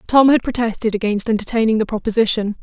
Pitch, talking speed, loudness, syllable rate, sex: 225 Hz, 160 wpm, -17 LUFS, 6.5 syllables/s, female